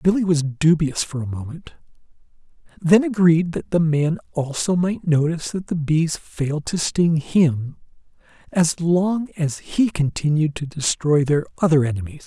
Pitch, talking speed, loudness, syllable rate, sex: 160 Hz, 150 wpm, -20 LUFS, 4.4 syllables/s, male